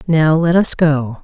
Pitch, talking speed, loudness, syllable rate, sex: 155 Hz, 195 wpm, -14 LUFS, 3.7 syllables/s, female